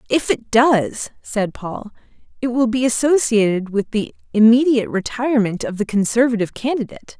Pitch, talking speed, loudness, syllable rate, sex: 230 Hz, 140 wpm, -18 LUFS, 5.4 syllables/s, female